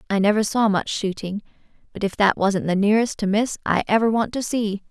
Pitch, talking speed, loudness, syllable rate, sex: 205 Hz, 220 wpm, -21 LUFS, 5.7 syllables/s, female